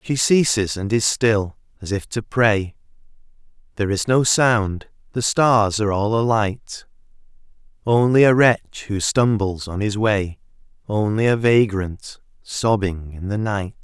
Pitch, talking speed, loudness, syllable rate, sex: 105 Hz, 145 wpm, -19 LUFS, 4.0 syllables/s, male